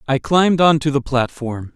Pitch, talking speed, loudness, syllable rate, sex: 140 Hz, 170 wpm, -17 LUFS, 5.0 syllables/s, male